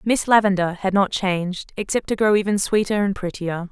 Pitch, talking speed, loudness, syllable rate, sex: 195 Hz, 195 wpm, -20 LUFS, 5.3 syllables/s, female